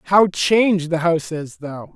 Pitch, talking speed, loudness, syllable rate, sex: 170 Hz, 185 wpm, -18 LUFS, 4.2 syllables/s, male